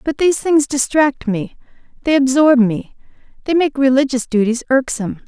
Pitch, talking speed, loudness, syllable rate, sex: 265 Hz, 150 wpm, -16 LUFS, 5.1 syllables/s, female